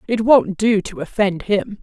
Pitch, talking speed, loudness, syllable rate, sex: 200 Hz, 200 wpm, -17 LUFS, 4.2 syllables/s, female